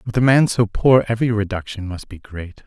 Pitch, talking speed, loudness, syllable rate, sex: 110 Hz, 225 wpm, -18 LUFS, 5.6 syllables/s, male